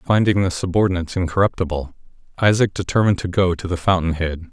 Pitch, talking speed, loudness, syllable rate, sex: 90 Hz, 160 wpm, -19 LUFS, 6.5 syllables/s, male